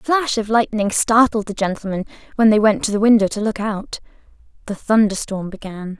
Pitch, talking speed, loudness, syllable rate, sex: 210 Hz, 190 wpm, -18 LUFS, 5.5 syllables/s, female